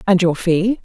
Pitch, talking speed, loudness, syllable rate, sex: 190 Hz, 215 wpm, -16 LUFS, 4.4 syllables/s, female